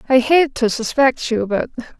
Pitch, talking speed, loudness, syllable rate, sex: 250 Hz, 180 wpm, -17 LUFS, 4.6 syllables/s, female